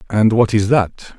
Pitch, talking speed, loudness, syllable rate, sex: 110 Hz, 205 wpm, -15 LUFS, 4.0 syllables/s, male